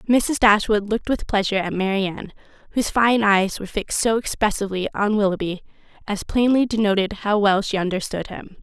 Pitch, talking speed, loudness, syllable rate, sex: 210 Hz, 165 wpm, -20 LUFS, 5.9 syllables/s, female